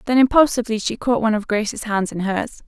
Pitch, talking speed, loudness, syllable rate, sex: 225 Hz, 225 wpm, -19 LUFS, 6.4 syllables/s, female